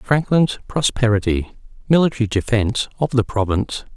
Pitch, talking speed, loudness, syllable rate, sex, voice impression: 120 Hz, 105 wpm, -19 LUFS, 5.4 syllables/s, male, masculine, adult-like, slightly muffled, slightly cool, slightly refreshing, sincere, friendly